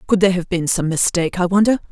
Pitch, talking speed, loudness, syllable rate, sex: 185 Hz, 250 wpm, -17 LUFS, 7.2 syllables/s, female